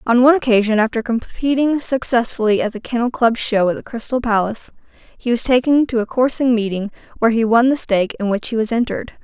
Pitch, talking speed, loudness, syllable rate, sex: 235 Hz, 210 wpm, -17 LUFS, 6.2 syllables/s, female